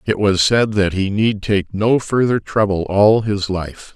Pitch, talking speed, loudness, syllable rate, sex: 100 Hz, 195 wpm, -16 LUFS, 3.9 syllables/s, male